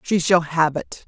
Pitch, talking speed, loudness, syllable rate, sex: 165 Hz, 225 wpm, -19 LUFS, 4.1 syllables/s, female